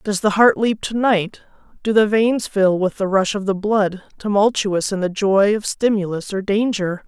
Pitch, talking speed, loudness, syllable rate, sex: 205 Hz, 205 wpm, -18 LUFS, 4.5 syllables/s, female